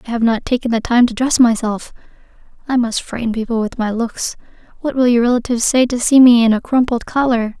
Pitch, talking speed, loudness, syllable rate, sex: 240 Hz, 220 wpm, -15 LUFS, 5.9 syllables/s, female